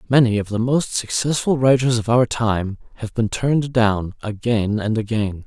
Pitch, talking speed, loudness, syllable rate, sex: 115 Hz, 175 wpm, -19 LUFS, 4.6 syllables/s, male